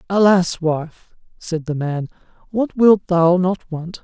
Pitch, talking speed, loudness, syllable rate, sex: 175 Hz, 150 wpm, -18 LUFS, 3.5 syllables/s, male